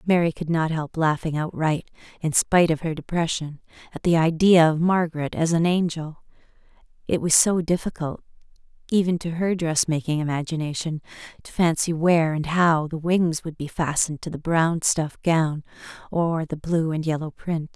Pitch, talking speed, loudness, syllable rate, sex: 160 Hz, 170 wpm, -23 LUFS, 4.4 syllables/s, female